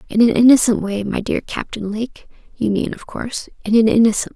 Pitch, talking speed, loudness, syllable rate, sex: 220 Hz, 205 wpm, -17 LUFS, 5.8 syllables/s, female